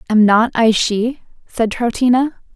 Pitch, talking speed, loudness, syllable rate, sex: 230 Hz, 140 wpm, -15 LUFS, 4.2 syllables/s, female